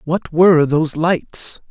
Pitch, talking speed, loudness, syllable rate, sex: 160 Hz, 140 wpm, -16 LUFS, 3.9 syllables/s, male